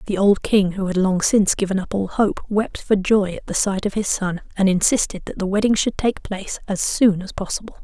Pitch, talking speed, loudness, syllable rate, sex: 195 Hz, 245 wpm, -20 LUFS, 5.5 syllables/s, female